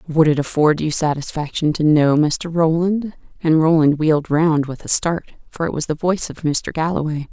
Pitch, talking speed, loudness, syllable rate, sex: 155 Hz, 195 wpm, -18 LUFS, 5.0 syllables/s, female